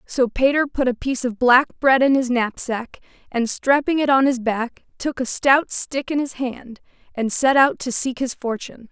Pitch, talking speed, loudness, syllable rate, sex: 255 Hz, 210 wpm, -20 LUFS, 4.6 syllables/s, female